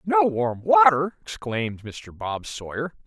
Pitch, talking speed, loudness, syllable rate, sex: 150 Hz, 135 wpm, -23 LUFS, 3.9 syllables/s, male